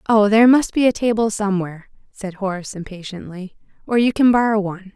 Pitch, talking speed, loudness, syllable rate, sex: 205 Hz, 180 wpm, -17 LUFS, 6.3 syllables/s, female